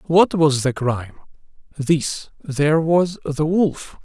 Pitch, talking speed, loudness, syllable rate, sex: 155 Hz, 135 wpm, -19 LUFS, 3.6 syllables/s, male